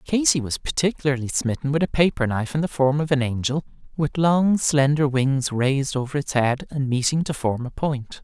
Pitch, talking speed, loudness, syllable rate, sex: 140 Hz, 205 wpm, -22 LUFS, 5.3 syllables/s, male